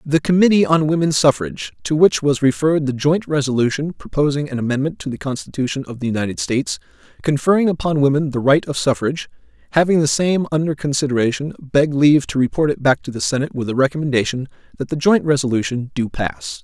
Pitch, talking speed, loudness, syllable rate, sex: 145 Hz, 190 wpm, -18 LUFS, 6.3 syllables/s, male